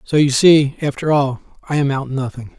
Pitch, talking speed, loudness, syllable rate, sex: 140 Hz, 210 wpm, -16 LUFS, 5.1 syllables/s, male